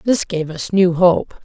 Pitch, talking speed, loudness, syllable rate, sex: 175 Hz, 210 wpm, -16 LUFS, 3.6 syllables/s, female